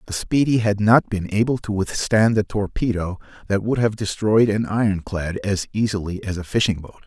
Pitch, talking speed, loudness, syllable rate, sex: 105 Hz, 185 wpm, -21 LUFS, 5.2 syllables/s, male